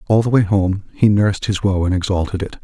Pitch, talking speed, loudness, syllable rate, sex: 100 Hz, 250 wpm, -17 LUFS, 5.9 syllables/s, male